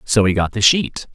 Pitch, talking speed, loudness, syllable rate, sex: 115 Hz, 260 wpm, -16 LUFS, 4.9 syllables/s, male